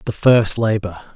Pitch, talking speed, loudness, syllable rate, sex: 110 Hz, 155 wpm, -16 LUFS, 4.4 syllables/s, male